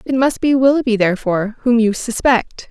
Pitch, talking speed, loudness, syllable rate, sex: 235 Hz, 180 wpm, -16 LUFS, 5.5 syllables/s, female